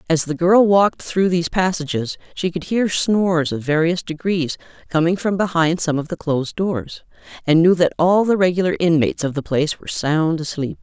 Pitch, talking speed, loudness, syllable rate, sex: 170 Hz, 195 wpm, -18 LUFS, 5.4 syllables/s, female